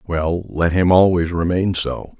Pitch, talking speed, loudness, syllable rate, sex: 85 Hz, 165 wpm, -18 LUFS, 4.0 syllables/s, male